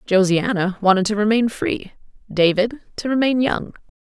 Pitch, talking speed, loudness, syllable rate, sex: 210 Hz, 135 wpm, -19 LUFS, 4.7 syllables/s, female